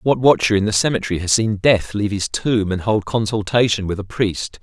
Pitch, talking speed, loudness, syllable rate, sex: 105 Hz, 220 wpm, -18 LUFS, 5.5 syllables/s, male